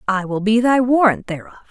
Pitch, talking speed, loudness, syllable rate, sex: 220 Hz, 210 wpm, -16 LUFS, 5.7 syllables/s, female